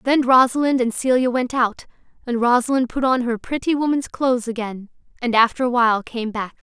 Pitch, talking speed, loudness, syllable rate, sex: 245 Hz, 190 wpm, -19 LUFS, 5.5 syllables/s, female